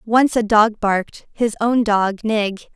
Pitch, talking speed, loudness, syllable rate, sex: 220 Hz, 155 wpm, -18 LUFS, 4.2 syllables/s, female